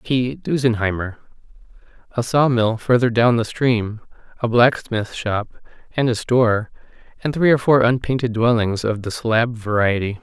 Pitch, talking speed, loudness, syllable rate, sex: 115 Hz, 140 wpm, -19 LUFS, 4.6 syllables/s, male